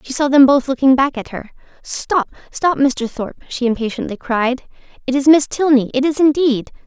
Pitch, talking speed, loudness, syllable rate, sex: 265 Hz, 190 wpm, -16 LUFS, 5.1 syllables/s, female